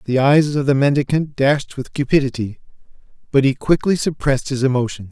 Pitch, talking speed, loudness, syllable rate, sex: 140 Hz, 165 wpm, -18 LUFS, 5.7 syllables/s, male